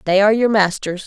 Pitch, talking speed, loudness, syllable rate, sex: 200 Hz, 225 wpm, -16 LUFS, 6.5 syllables/s, female